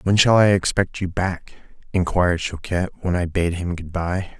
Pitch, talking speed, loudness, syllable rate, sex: 90 Hz, 190 wpm, -21 LUFS, 5.0 syllables/s, male